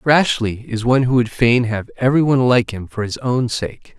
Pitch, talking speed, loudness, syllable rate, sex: 120 Hz, 225 wpm, -17 LUFS, 5.2 syllables/s, male